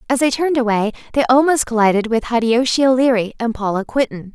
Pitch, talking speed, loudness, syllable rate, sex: 240 Hz, 180 wpm, -16 LUFS, 6.1 syllables/s, female